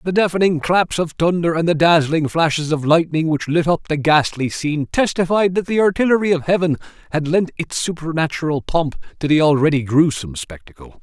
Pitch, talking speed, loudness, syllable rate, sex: 160 Hz, 180 wpm, -18 LUFS, 5.6 syllables/s, male